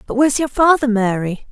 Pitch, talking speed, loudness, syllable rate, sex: 245 Hz, 200 wpm, -16 LUFS, 5.9 syllables/s, female